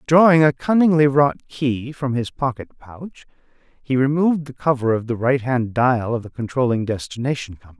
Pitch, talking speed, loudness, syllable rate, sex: 130 Hz, 170 wpm, -19 LUFS, 5.1 syllables/s, male